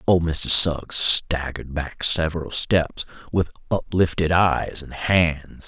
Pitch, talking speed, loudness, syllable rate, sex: 80 Hz, 125 wpm, -21 LUFS, 3.6 syllables/s, male